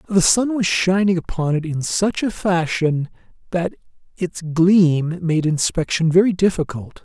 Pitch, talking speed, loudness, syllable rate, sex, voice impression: 175 Hz, 145 wpm, -19 LUFS, 4.2 syllables/s, male, masculine, slightly old, slightly thick, slightly muffled, slightly sincere, calm, slightly elegant